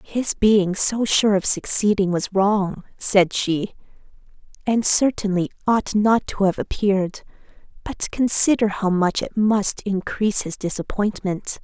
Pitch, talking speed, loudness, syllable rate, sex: 200 Hz, 135 wpm, -20 LUFS, 4.0 syllables/s, female